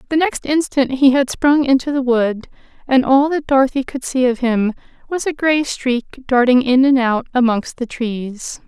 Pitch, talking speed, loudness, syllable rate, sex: 260 Hz, 195 wpm, -16 LUFS, 4.5 syllables/s, female